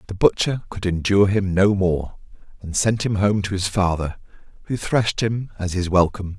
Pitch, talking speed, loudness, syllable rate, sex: 100 Hz, 190 wpm, -21 LUFS, 5.2 syllables/s, male